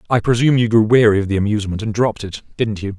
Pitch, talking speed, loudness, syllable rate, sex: 110 Hz, 260 wpm, -16 LUFS, 7.5 syllables/s, male